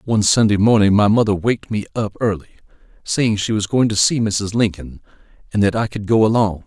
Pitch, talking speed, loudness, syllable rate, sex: 105 Hz, 205 wpm, -17 LUFS, 5.8 syllables/s, male